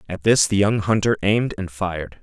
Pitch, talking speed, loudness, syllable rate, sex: 100 Hz, 215 wpm, -20 LUFS, 5.6 syllables/s, male